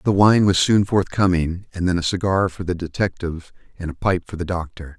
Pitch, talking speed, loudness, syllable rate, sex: 90 Hz, 215 wpm, -20 LUFS, 5.5 syllables/s, male